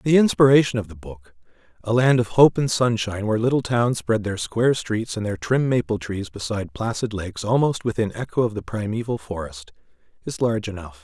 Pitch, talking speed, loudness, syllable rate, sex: 110 Hz, 185 wpm, -22 LUFS, 5.8 syllables/s, male